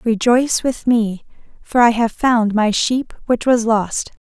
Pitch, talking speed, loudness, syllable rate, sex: 230 Hz, 170 wpm, -17 LUFS, 3.9 syllables/s, female